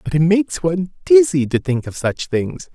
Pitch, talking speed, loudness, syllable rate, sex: 165 Hz, 220 wpm, -17 LUFS, 5.2 syllables/s, male